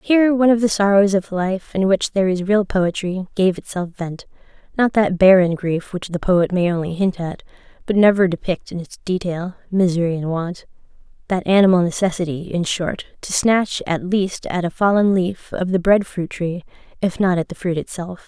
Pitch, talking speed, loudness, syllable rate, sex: 185 Hz, 195 wpm, -19 LUFS, 5.1 syllables/s, female